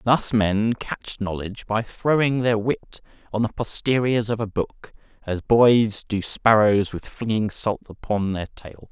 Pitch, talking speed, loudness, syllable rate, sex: 110 Hz, 160 wpm, -22 LUFS, 4.0 syllables/s, male